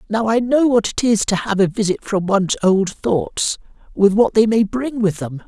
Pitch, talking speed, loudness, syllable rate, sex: 210 Hz, 230 wpm, -17 LUFS, 4.7 syllables/s, male